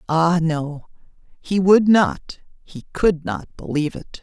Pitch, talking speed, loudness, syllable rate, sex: 170 Hz, 140 wpm, -19 LUFS, 3.7 syllables/s, female